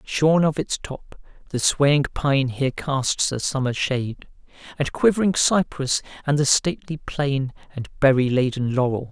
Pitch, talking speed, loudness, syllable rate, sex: 140 Hz, 150 wpm, -21 LUFS, 4.5 syllables/s, male